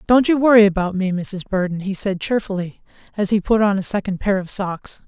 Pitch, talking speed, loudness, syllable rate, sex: 200 Hz, 225 wpm, -19 LUFS, 5.5 syllables/s, female